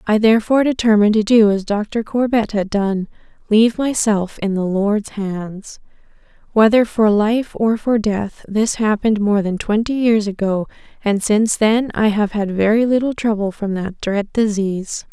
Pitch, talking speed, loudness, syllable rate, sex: 215 Hz, 160 wpm, -17 LUFS, 4.6 syllables/s, female